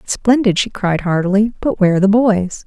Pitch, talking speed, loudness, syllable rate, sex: 200 Hz, 205 wpm, -15 LUFS, 5.6 syllables/s, female